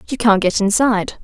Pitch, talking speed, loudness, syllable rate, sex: 215 Hz, 195 wpm, -15 LUFS, 5.7 syllables/s, female